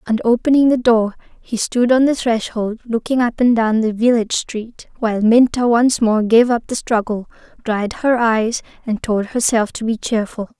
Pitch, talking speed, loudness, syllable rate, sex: 230 Hz, 185 wpm, -17 LUFS, 4.7 syllables/s, female